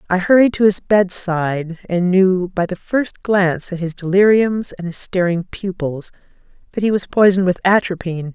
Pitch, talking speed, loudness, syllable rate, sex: 185 Hz, 180 wpm, -17 LUFS, 4.9 syllables/s, female